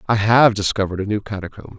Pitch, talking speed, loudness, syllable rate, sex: 105 Hz, 200 wpm, -17 LUFS, 6.8 syllables/s, male